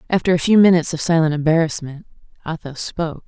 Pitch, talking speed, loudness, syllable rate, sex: 165 Hz, 165 wpm, -17 LUFS, 6.7 syllables/s, female